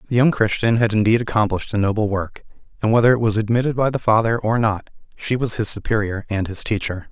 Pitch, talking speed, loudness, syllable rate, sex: 110 Hz, 220 wpm, -19 LUFS, 6.2 syllables/s, male